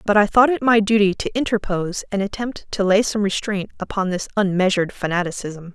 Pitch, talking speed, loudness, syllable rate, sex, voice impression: 200 Hz, 190 wpm, -20 LUFS, 5.8 syllables/s, female, very feminine, very adult-like, middle-aged, slightly thin, slightly tensed, slightly weak, slightly bright, slightly hard, clear, fluent, slightly cute, intellectual, very refreshing, very sincere, very calm, friendly, reassuring, slightly unique, elegant, slightly sweet, slightly lively, kind, slightly sharp, slightly modest